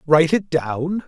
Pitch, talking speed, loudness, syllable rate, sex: 160 Hz, 165 wpm, -19 LUFS, 4.3 syllables/s, male